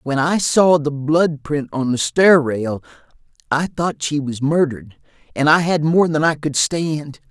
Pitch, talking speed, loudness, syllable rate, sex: 150 Hz, 190 wpm, -17 LUFS, 4.1 syllables/s, male